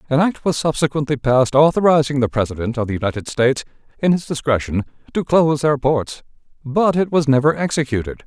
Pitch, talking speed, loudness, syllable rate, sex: 140 Hz, 175 wpm, -18 LUFS, 6.1 syllables/s, male